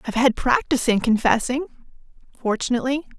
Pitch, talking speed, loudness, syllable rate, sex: 245 Hz, 115 wpm, -21 LUFS, 7.1 syllables/s, female